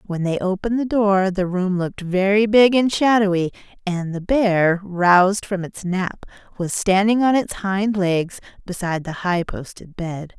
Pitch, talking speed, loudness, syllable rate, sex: 190 Hz, 175 wpm, -19 LUFS, 4.5 syllables/s, female